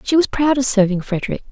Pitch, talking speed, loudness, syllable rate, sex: 240 Hz, 240 wpm, -17 LUFS, 6.6 syllables/s, female